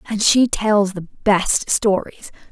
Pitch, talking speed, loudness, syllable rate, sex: 205 Hz, 145 wpm, -17 LUFS, 3.3 syllables/s, female